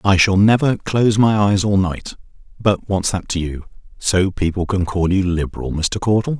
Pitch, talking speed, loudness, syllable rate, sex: 95 Hz, 190 wpm, -18 LUFS, 5.0 syllables/s, male